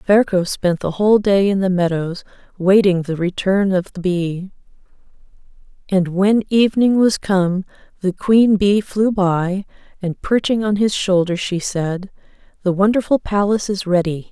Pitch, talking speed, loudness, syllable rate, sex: 190 Hz, 150 wpm, -17 LUFS, 4.5 syllables/s, female